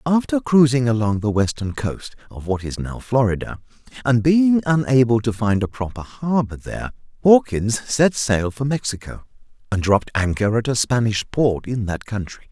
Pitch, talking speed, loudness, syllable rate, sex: 120 Hz, 170 wpm, -20 LUFS, 4.9 syllables/s, male